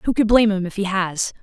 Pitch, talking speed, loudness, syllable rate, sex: 200 Hz, 295 wpm, -19 LUFS, 6.1 syllables/s, female